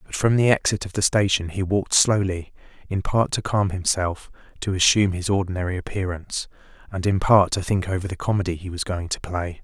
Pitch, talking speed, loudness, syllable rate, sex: 95 Hz, 205 wpm, -22 LUFS, 5.8 syllables/s, male